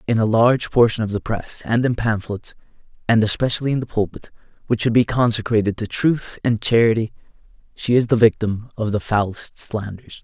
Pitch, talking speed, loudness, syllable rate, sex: 110 Hz, 180 wpm, -19 LUFS, 5.4 syllables/s, male